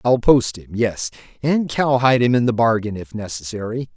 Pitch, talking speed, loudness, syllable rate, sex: 115 Hz, 165 wpm, -19 LUFS, 5.2 syllables/s, male